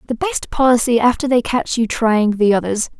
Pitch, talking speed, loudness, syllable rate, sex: 240 Hz, 200 wpm, -16 LUFS, 5.1 syllables/s, female